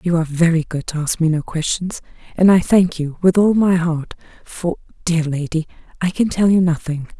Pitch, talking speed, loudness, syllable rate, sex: 170 Hz, 210 wpm, -18 LUFS, 5.2 syllables/s, female